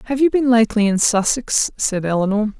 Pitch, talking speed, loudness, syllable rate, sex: 225 Hz, 185 wpm, -17 LUFS, 5.5 syllables/s, female